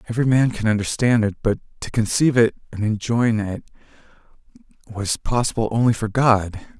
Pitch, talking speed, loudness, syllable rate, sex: 115 Hz, 150 wpm, -20 LUFS, 5.7 syllables/s, male